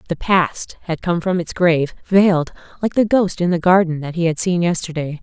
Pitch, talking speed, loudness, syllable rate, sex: 175 Hz, 220 wpm, -18 LUFS, 5.3 syllables/s, female